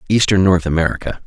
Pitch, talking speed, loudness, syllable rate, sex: 90 Hz, 145 wpm, -15 LUFS, 6.7 syllables/s, male